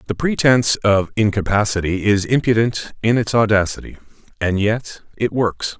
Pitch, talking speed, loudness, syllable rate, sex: 105 Hz, 135 wpm, -18 LUFS, 4.9 syllables/s, male